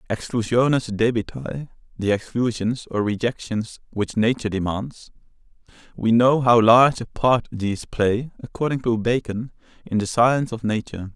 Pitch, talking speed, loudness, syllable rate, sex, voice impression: 115 Hz, 125 wpm, -21 LUFS, 4.8 syllables/s, male, masculine, adult-like, tensed, slightly powerful, slightly bright, clear, calm, friendly, slightly reassuring, kind, modest